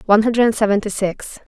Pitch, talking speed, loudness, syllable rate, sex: 210 Hz, 155 wpm, -17 LUFS, 6.2 syllables/s, female